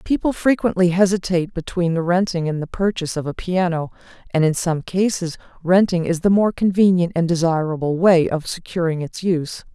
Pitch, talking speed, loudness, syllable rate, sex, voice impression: 175 Hz, 170 wpm, -19 LUFS, 5.5 syllables/s, female, feminine, adult-like, tensed, powerful, slightly hard, clear, fluent, intellectual, calm, slightly reassuring, elegant, lively, slightly strict, slightly sharp